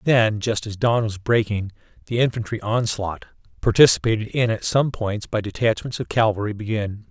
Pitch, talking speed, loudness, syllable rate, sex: 110 Hz, 160 wpm, -21 LUFS, 5.1 syllables/s, male